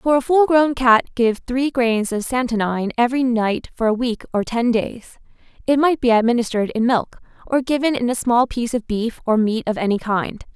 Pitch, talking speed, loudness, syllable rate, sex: 240 Hz, 210 wpm, -19 LUFS, 5.3 syllables/s, female